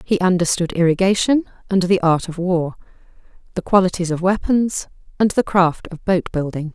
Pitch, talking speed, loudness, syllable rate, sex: 180 Hz, 150 wpm, -18 LUFS, 5.1 syllables/s, female